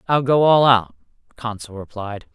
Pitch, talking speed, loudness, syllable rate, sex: 115 Hz, 155 wpm, -18 LUFS, 4.6 syllables/s, male